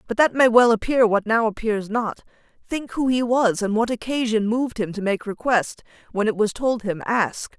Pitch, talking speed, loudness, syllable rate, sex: 225 Hz, 215 wpm, -21 LUFS, 4.9 syllables/s, female